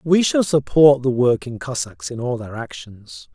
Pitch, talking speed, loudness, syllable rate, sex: 135 Hz, 180 wpm, -18 LUFS, 4.3 syllables/s, male